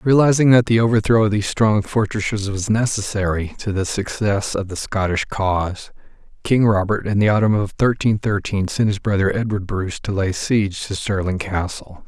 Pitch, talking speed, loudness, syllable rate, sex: 100 Hz, 180 wpm, -19 LUFS, 5.2 syllables/s, male